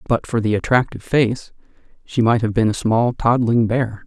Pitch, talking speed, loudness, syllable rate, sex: 115 Hz, 190 wpm, -18 LUFS, 5.0 syllables/s, male